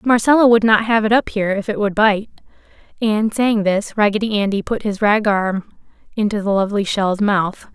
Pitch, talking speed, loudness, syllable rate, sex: 210 Hz, 195 wpm, -17 LUFS, 5.1 syllables/s, female